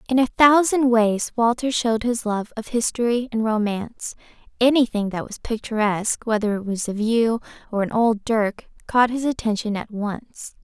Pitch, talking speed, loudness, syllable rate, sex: 225 Hz, 170 wpm, -21 LUFS, 4.8 syllables/s, female